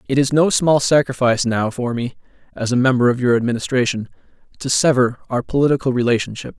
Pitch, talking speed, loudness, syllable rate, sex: 125 Hz, 175 wpm, -18 LUFS, 6.3 syllables/s, male